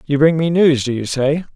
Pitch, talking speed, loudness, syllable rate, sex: 145 Hz, 270 wpm, -16 LUFS, 5.1 syllables/s, male